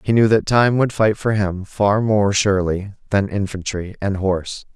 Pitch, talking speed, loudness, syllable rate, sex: 100 Hz, 190 wpm, -18 LUFS, 4.6 syllables/s, male